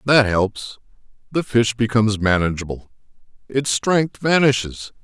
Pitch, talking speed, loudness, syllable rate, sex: 115 Hz, 105 wpm, -19 LUFS, 4.3 syllables/s, male